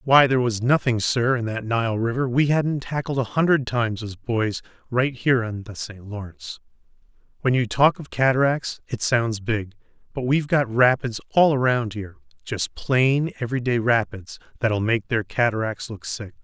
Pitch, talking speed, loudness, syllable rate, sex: 120 Hz, 185 wpm, -22 LUFS, 5.0 syllables/s, male